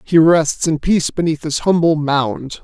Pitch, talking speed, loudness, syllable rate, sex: 155 Hz, 180 wpm, -16 LUFS, 4.4 syllables/s, male